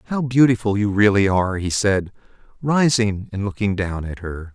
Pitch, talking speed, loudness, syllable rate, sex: 105 Hz, 170 wpm, -19 LUFS, 5.0 syllables/s, male